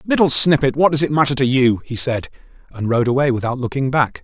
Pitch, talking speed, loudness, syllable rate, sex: 135 Hz, 225 wpm, -17 LUFS, 6.0 syllables/s, male